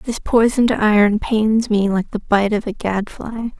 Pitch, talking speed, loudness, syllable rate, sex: 215 Hz, 200 wpm, -17 LUFS, 4.4 syllables/s, female